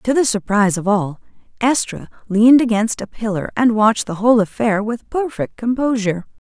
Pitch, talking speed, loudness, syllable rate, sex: 220 Hz, 165 wpm, -17 LUFS, 5.5 syllables/s, female